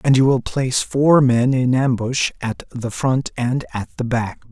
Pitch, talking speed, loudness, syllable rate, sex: 125 Hz, 200 wpm, -19 LUFS, 4.1 syllables/s, male